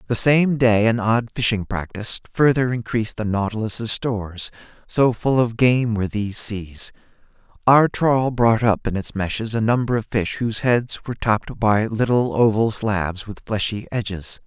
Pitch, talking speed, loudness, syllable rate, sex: 110 Hz, 170 wpm, -20 LUFS, 4.7 syllables/s, male